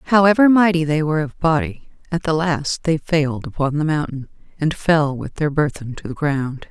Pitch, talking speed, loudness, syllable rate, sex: 155 Hz, 195 wpm, -19 LUFS, 5.0 syllables/s, female